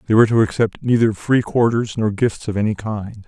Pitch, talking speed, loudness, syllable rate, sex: 110 Hz, 220 wpm, -18 LUFS, 5.5 syllables/s, male